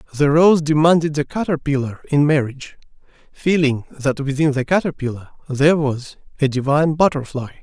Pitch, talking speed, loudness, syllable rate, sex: 145 Hz, 135 wpm, -18 LUFS, 5.5 syllables/s, male